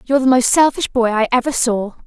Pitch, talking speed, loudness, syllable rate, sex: 250 Hz, 235 wpm, -15 LUFS, 6.0 syllables/s, female